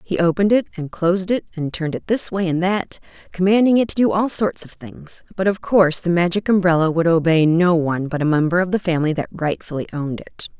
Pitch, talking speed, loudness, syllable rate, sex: 175 Hz, 230 wpm, -19 LUFS, 6.1 syllables/s, female